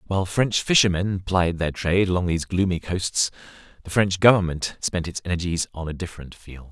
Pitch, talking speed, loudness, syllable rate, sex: 90 Hz, 180 wpm, -22 LUFS, 5.7 syllables/s, male